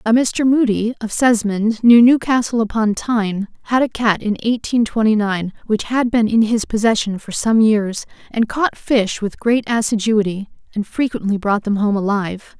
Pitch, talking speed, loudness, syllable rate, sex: 220 Hz, 175 wpm, -17 LUFS, 4.7 syllables/s, female